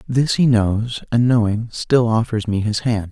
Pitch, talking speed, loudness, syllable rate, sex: 115 Hz, 195 wpm, -18 LUFS, 4.3 syllables/s, male